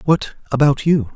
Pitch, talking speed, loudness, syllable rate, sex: 140 Hz, 155 wpm, -17 LUFS, 4.7 syllables/s, male